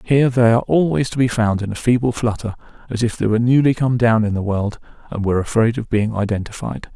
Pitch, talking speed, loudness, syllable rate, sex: 115 Hz, 235 wpm, -18 LUFS, 6.4 syllables/s, male